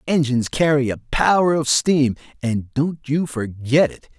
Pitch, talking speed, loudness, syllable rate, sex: 140 Hz, 160 wpm, -19 LUFS, 4.5 syllables/s, male